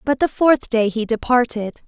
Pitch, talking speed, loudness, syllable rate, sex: 240 Hz, 190 wpm, -18 LUFS, 4.9 syllables/s, female